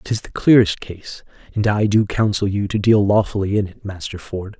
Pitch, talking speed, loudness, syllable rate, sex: 100 Hz, 210 wpm, -18 LUFS, 5.0 syllables/s, male